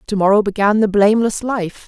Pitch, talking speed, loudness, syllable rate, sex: 210 Hz, 190 wpm, -15 LUFS, 5.8 syllables/s, female